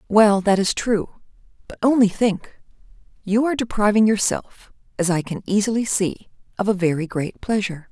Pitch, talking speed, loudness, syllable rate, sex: 205 Hz, 160 wpm, -20 LUFS, 5.2 syllables/s, female